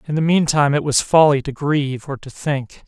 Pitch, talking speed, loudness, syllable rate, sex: 145 Hz, 230 wpm, -18 LUFS, 5.5 syllables/s, male